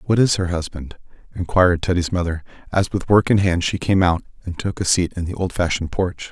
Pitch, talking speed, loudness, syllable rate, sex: 90 Hz, 220 wpm, -20 LUFS, 5.7 syllables/s, male